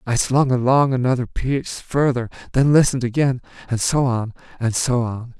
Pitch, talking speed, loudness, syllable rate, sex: 125 Hz, 165 wpm, -19 LUFS, 5.2 syllables/s, male